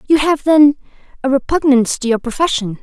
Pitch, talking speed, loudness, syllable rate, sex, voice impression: 270 Hz, 170 wpm, -14 LUFS, 6.0 syllables/s, female, very feminine, slightly adult-like, tensed, bright, slightly clear, refreshing, lively